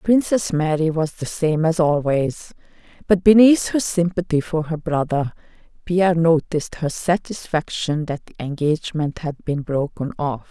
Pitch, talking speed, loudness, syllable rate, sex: 165 Hz, 145 wpm, -20 LUFS, 4.5 syllables/s, female